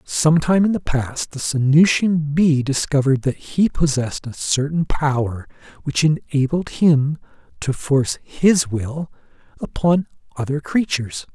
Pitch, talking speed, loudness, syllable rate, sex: 145 Hz, 130 wpm, -19 LUFS, 4.3 syllables/s, male